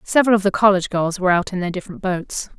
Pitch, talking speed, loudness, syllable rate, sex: 190 Hz, 255 wpm, -19 LUFS, 7.4 syllables/s, female